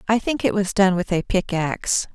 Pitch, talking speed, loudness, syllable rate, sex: 190 Hz, 225 wpm, -21 LUFS, 5.2 syllables/s, female